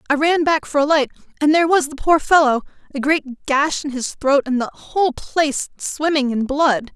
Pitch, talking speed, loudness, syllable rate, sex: 290 Hz, 215 wpm, -18 LUFS, 5.1 syllables/s, female